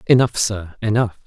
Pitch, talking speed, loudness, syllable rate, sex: 105 Hz, 140 wpm, -19 LUFS, 4.7 syllables/s, male